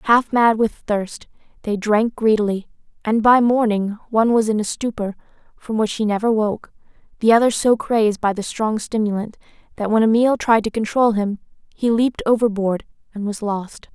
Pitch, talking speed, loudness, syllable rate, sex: 220 Hz, 175 wpm, -19 LUFS, 5.0 syllables/s, female